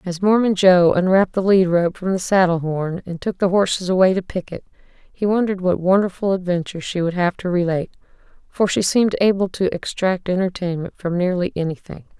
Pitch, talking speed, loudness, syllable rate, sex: 185 Hz, 185 wpm, -19 LUFS, 5.7 syllables/s, female